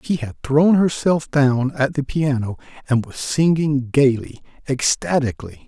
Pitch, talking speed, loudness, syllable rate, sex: 135 Hz, 135 wpm, -19 LUFS, 4.2 syllables/s, male